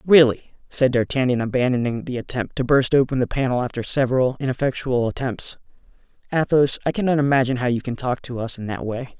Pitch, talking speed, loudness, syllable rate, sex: 130 Hz, 185 wpm, -21 LUFS, 6.1 syllables/s, male